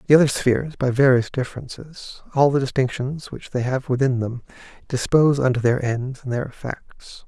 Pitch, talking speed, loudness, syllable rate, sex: 130 Hz, 175 wpm, -21 LUFS, 5.3 syllables/s, male